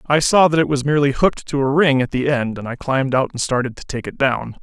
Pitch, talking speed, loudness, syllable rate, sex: 135 Hz, 300 wpm, -18 LUFS, 6.3 syllables/s, male